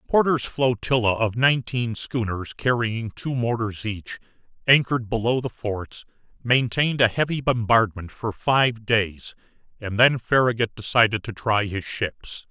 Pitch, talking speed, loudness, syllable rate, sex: 115 Hz, 135 wpm, -22 LUFS, 4.4 syllables/s, male